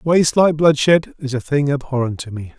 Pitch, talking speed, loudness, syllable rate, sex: 140 Hz, 210 wpm, -17 LUFS, 5.4 syllables/s, male